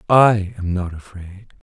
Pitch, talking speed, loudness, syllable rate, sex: 100 Hz, 135 wpm, -18 LUFS, 3.7 syllables/s, male